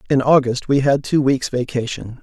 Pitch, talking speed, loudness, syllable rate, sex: 135 Hz, 190 wpm, -18 LUFS, 5.0 syllables/s, male